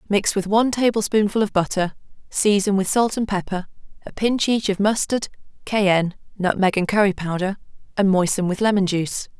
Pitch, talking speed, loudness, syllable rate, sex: 200 Hz, 165 wpm, -20 LUFS, 5.4 syllables/s, female